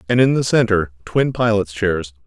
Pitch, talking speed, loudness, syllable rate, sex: 105 Hz, 185 wpm, -18 LUFS, 4.8 syllables/s, male